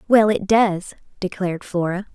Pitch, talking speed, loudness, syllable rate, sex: 195 Hz, 140 wpm, -20 LUFS, 4.8 syllables/s, female